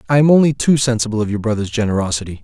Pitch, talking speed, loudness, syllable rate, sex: 115 Hz, 220 wpm, -16 LUFS, 7.6 syllables/s, male